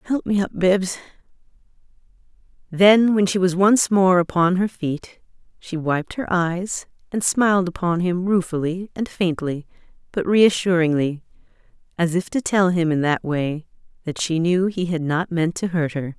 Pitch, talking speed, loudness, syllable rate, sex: 180 Hz, 165 wpm, -20 LUFS, 4.4 syllables/s, female